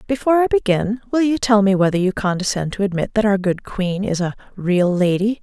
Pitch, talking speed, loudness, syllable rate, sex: 205 Hz, 220 wpm, -18 LUFS, 5.7 syllables/s, female